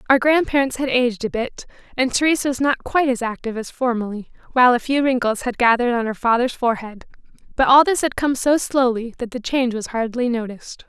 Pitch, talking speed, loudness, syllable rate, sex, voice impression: 250 Hz, 210 wpm, -19 LUFS, 6.3 syllables/s, female, very feminine, very young, very thin, very tensed, powerful, very bright, slightly hard, very clear, fluent, slightly nasal, very cute, slightly intellectual, very refreshing, sincere, slightly calm, friendly, reassuring, very unique, slightly elegant, slightly wild, sweet, very lively, intense, very sharp, very light